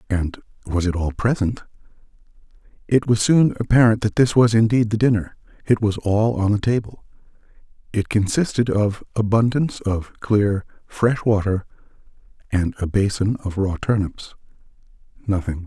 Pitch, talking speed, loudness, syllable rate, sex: 105 Hz, 140 wpm, -20 LUFS, 5.0 syllables/s, male